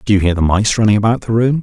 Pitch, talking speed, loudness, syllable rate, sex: 110 Hz, 330 wpm, -14 LUFS, 7.2 syllables/s, male